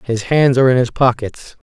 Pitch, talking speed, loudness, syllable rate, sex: 125 Hz, 215 wpm, -14 LUFS, 5.3 syllables/s, male